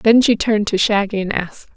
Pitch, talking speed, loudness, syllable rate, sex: 210 Hz, 240 wpm, -17 LUFS, 6.0 syllables/s, female